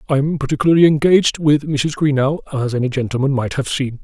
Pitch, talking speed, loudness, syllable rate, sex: 140 Hz, 180 wpm, -16 LUFS, 5.7 syllables/s, male